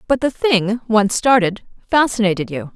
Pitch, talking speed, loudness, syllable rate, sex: 220 Hz, 155 wpm, -17 LUFS, 4.9 syllables/s, female